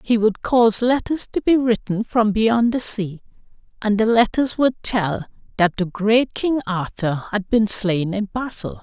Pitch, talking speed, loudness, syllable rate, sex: 215 Hz, 175 wpm, -20 LUFS, 4.2 syllables/s, female